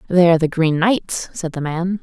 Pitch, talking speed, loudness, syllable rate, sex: 175 Hz, 235 wpm, -18 LUFS, 5.0 syllables/s, female